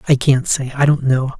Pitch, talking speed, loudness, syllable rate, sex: 135 Hz, 260 wpm, -16 LUFS, 5.3 syllables/s, male